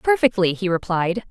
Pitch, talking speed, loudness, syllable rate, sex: 200 Hz, 140 wpm, -20 LUFS, 4.9 syllables/s, female